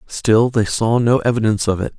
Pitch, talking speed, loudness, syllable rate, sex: 115 Hz, 210 wpm, -16 LUFS, 5.4 syllables/s, male